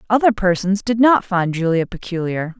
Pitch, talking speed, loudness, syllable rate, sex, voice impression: 195 Hz, 160 wpm, -18 LUFS, 5.0 syllables/s, female, feminine, middle-aged, slightly powerful, slightly soft, fluent, intellectual, calm, slightly friendly, slightly reassuring, elegant, lively, slightly sharp